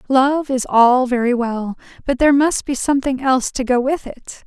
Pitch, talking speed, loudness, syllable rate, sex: 260 Hz, 200 wpm, -17 LUFS, 5.0 syllables/s, female